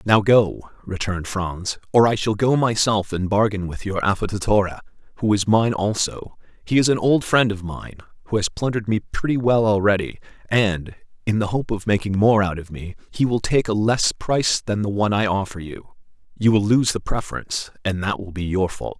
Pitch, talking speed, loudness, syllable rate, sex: 105 Hz, 205 wpm, -21 LUFS, 5.3 syllables/s, male